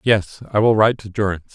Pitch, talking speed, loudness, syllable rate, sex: 105 Hz, 230 wpm, -18 LUFS, 6.6 syllables/s, male